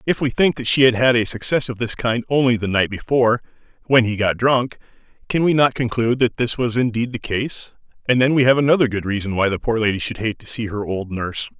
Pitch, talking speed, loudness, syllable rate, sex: 120 Hz, 250 wpm, -19 LUFS, 6.0 syllables/s, male